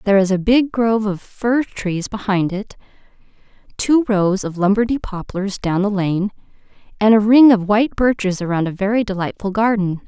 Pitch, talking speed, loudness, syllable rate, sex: 205 Hz, 175 wpm, -17 LUFS, 5.1 syllables/s, female